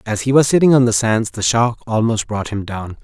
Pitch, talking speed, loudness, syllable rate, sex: 115 Hz, 255 wpm, -16 LUFS, 5.2 syllables/s, male